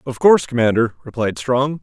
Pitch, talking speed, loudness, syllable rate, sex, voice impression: 120 Hz, 165 wpm, -17 LUFS, 5.6 syllables/s, male, masculine, adult-like, slightly thick, cool, intellectual, slightly refreshing